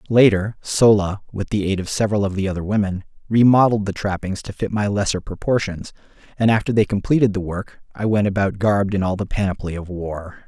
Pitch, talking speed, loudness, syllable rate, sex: 100 Hz, 200 wpm, -20 LUFS, 5.9 syllables/s, male